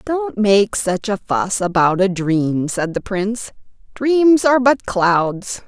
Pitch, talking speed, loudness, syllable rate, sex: 205 Hz, 160 wpm, -17 LUFS, 3.5 syllables/s, female